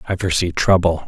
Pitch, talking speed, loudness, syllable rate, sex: 90 Hz, 165 wpm, -17 LUFS, 6.7 syllables/s, male